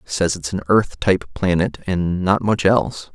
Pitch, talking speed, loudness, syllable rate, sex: 90 Hz, 190 wpm, -19 LUFS, 4.6 syllables/s, male